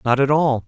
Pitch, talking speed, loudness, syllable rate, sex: 135 Hz, 270 wpm, -17 LUFS, 5.5 syllables/s, male